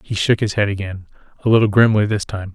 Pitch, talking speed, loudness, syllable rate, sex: 105 Hz, 210 wpm, -17 LUFS, 6.1 syllables/s, male